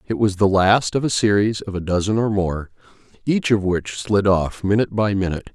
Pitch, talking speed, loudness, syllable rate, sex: 100 Hz, 215 wpm, -19 LUFS, 5.5 syllables/s, male